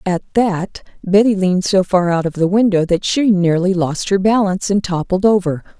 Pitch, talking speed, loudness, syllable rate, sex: 190 Hz, 195 wpm, -15 LUFS, 5.2 syllables/s, female